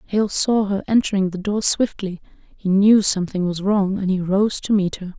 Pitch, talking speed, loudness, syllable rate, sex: 195 Hz, 210 wpm, -19 LUFS, 4.8 syllables/s, female